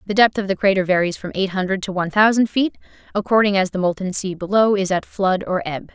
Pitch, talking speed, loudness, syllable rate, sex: 195 Hz, 240 wpm, -19 LUFS, 6.2 syllables/s, female